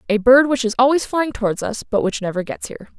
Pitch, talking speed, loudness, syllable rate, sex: 240 Hz, 260 wpm, -18 LUFS, 6.3 syllables/s, female